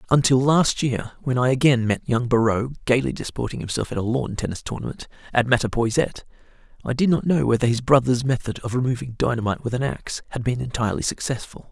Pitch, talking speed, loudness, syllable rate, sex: 125 Hz, 190 wpm, -22 LUFS, 6.3 syllables/s, male